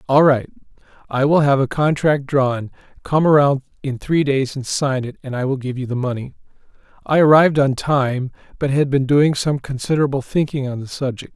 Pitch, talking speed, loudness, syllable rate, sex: 135 Hz, 195 wpm, -18 LUFS, 5.3 syllables/s, male